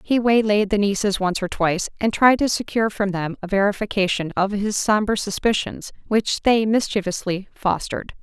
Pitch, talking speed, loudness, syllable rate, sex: 205 Hz, 170 wpm, -21 LUFS, 5.2 syllables/s, female